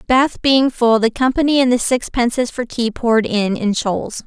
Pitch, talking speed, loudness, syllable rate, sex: 240 Hz, 195 wpm, -16 LUFS, 4.6 syllables/s, female